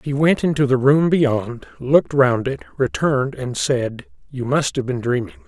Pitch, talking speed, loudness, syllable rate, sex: 135 Hz, 185 wpm, -19 LUFS, 4.6 syllables/s, male